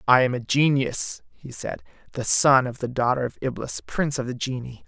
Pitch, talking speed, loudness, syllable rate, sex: 130 Hz, 210 wpm, -23 LUFS, 5.2 syllables/s, male